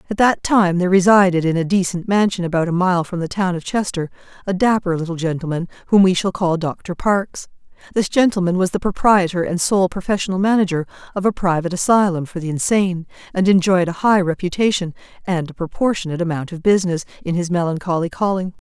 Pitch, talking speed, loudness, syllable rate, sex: 180 Hz, 185 wpm, -18 LUFS, 6.2 syllables/s, female